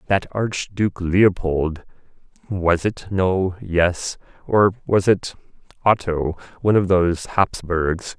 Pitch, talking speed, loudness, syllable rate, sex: 95 Hz, 110 wpm, -20 LUFS, 3.7 syllables/s, male